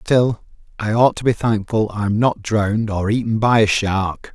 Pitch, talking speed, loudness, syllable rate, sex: 110 Hz, 195 wpm, -18 LUFS, 4.3 syllables/s, male